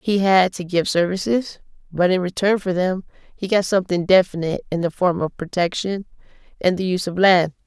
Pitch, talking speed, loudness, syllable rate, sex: 185 Hz, 190 wpm, -20 LUFS, 5.7 syllables/s, female